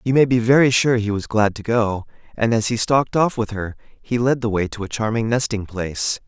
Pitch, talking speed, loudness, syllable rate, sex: 115 Hz, 250 wpm, -19 LUFS, 5.4 syllables/s, male